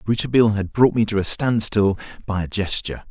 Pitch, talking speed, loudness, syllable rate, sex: 105 Hz, 195 wpm, -20 LUFS, 6.4 syllables/s, male